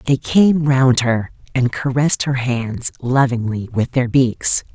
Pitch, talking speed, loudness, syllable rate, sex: 130 Hz, 150 wpm, -17 LUFS, 4.0 syllables/s, female